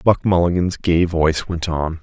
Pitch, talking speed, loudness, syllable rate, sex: 85 Hz, 180 wpm, -18 LUFS, 4.7 syllables/s, male